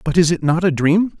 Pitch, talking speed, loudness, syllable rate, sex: 170 Hz, 300 wpm, -16 LUFS, 5.6 syllables/s, male